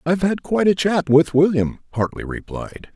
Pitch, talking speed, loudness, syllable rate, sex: 165 Hz, 185 wpm, -19 LUFS, 5.4 syllables/s, male